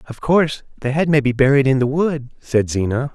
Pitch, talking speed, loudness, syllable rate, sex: 135 Hz, 230 wpm, -18 LUFS, 5.5 syllables/s, male